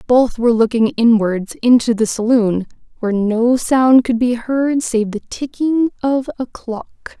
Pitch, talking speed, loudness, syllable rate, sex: 240 Hz, 150 wpm, -16 LUFS, 4.1 syllables/s, female